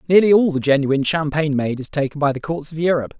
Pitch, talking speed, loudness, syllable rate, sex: 150 Hz, 245 wpm, -18 LUFS, 7.0 syllables/s, male